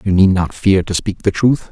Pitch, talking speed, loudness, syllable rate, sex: 95 Hz, 280 wpm, -15 LUFS, 5.0 syllables/s, male